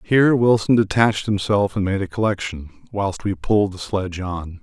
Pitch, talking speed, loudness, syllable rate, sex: 100 Hz, 180 wpm, -20 LUFS, 5.4 syllables/s, male